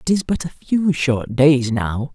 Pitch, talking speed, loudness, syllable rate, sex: 140 Hz, 225 wpm, -18 LUFS, 3.8 syllables/s, male